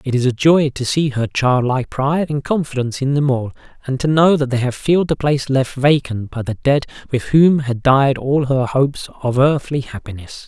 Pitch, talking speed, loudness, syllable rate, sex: 135 Hz, 220 wpm, -17 LUFS, 5.4 syllables/s, male